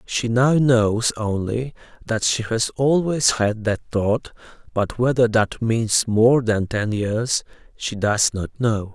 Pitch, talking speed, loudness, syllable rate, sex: 115 Hz, 155 wpm, -20 LUFS, 3.4 syllables/s, male